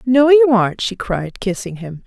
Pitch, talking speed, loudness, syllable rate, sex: 215 Hz, 205 wpm, -15 LUFS, 4.6 syllables/s, female